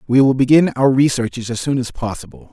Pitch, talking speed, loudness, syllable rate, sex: 125 Hz, 215 wpm, -16 LUFS, 6.0 syllables/s, male